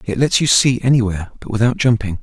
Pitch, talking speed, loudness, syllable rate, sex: 115 Hz, 215 wpm, -16 LUFS, 6.3 syllables/s, male